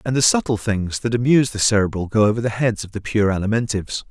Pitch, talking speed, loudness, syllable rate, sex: 110 Hz, 235 wpm, -19 LUFS, 6.6 syllables/s, male